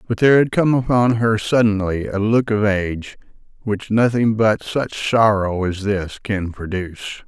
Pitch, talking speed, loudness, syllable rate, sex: 105 Hz, 165 wpm, -18 LUFS, 4.5 syllables/s, male